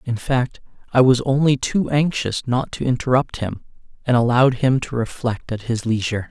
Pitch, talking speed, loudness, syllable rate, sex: 125 Hz, 180 wpm, -20 LUFS, 5.1 syllables/s, male